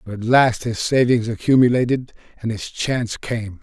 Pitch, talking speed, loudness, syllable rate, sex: 115 Hz, 165 wpm, -19 LUFS, 5.0 syllables/s, male